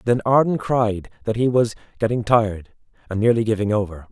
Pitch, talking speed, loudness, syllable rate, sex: 110 Hz, 175 wpm, -20 LUFS, 5.6 syllables/s, male